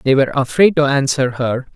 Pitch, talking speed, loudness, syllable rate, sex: 135 Hz, 205 wpm, -15 LUFS, 5.6 syllables/s, male